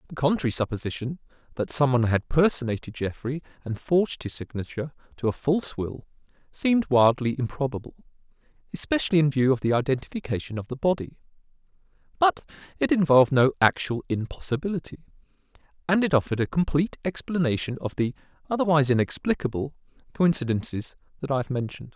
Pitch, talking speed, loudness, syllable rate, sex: 140 Hz, 130 wpm, -25 LUFS, 6.4 syllables/s, male